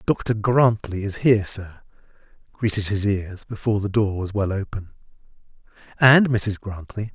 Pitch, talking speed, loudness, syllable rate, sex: 105 Hz, 145 wpm, -21 LUFS, 4.6 syllables/s, male